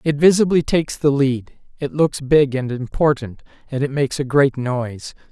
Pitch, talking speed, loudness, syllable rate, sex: 140 Hz, 180 wpm, -19 LUFS, 5.0 syllables/s, male